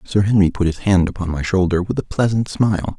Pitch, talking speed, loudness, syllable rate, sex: 95 Hz, 240 wpm, -18 LUFS, 5.9 syllables/s, male